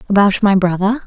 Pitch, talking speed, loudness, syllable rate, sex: 200 Hz, 170 wpm, -14 LUFS, 5.9 syllables/s, female